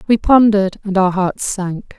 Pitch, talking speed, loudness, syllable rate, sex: 200 Hz, 180 wpm, -15 LUFS, 4.4 syllables/s, female